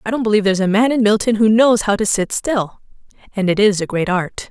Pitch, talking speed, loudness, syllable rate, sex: 210 Hz, 265 wpm, -16 LUFS, 6.2 syllables/s, female